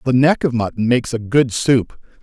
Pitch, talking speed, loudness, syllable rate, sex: 125 Hz, 215 wpm, -17 LUFS, 5.2 syllables/s, male